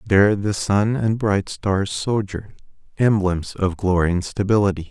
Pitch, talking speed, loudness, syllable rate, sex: 100 Hz, 145 wpm, -20 LUFS, 4.5 syllables/s, male